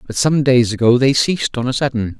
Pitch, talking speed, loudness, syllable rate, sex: 125 Hz, 245 wpm, -15 LUFS, 5.7 syllables/s, male